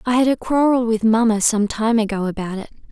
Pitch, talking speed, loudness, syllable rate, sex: 225 Hz, 225 wpm, -18 LUFS, 5.8 syllables/s, female